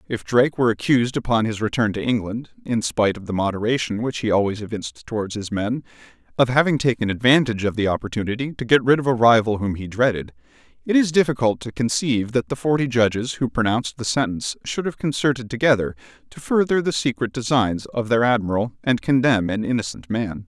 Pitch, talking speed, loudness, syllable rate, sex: 120 Hz, 190 wpm, -21 LUFS, 6.2 syllables/s, male